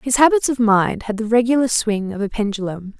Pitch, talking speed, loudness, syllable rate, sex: 225 Hz, 220 wpm, -18 LUFS, 5.5 syllables/s, female